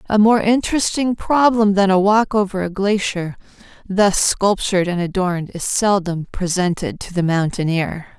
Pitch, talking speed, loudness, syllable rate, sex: 195 Hz, 145 wpm, -18 LUFS, 4.7 syllables/s, female